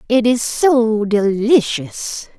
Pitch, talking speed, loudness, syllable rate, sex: 225 Hz, 100 wpm, -16 LUFS, 2.8 syllables/s, female